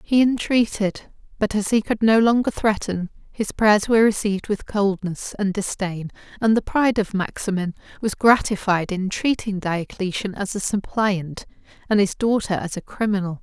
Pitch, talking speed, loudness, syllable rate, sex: 205 Hz, 160 wpm, -21 LUFS, 4.8 syllables/s, female